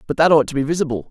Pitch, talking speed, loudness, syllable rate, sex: 145 Hz, 325 wpm, -17 LUFS, 8.4 syllables/s, male